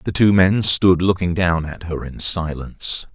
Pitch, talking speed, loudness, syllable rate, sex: 90 Hz, 190 wpm, -18 LUFS, 4.4 syllables/s, male